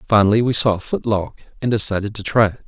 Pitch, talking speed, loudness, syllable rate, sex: 105 Hz, 245 wpm, -18 LUFS, 6.8 syllables/s, male